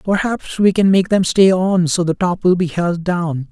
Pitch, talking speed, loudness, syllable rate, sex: 180 Hz, 240 wpm, -15 LUFS, 4.4 syllables/s, male